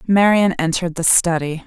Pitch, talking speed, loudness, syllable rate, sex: 175 Hz, 145 wpm, -16 LUFS, 5.1 syllables/s, female